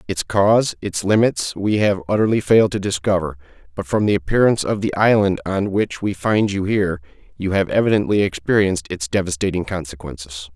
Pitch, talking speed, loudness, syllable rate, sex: 95 Hz, 170 wpm, -19 LUFS, 5.7 syllables/s, male